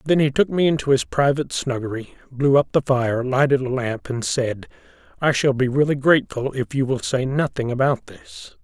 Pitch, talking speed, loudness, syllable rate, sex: 135 Hz, 200 wpm, -20 LUFS, 5.2 syllables/s, male